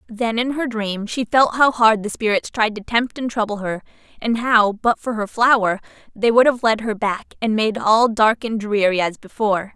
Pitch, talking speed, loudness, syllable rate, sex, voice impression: 220 Hz, 220 wpm, -19 LUFS, 4.8 syllables/s, female, feminine, slightly adult-like, slightly clear, slightly sincere, slightly friendly, slightly unique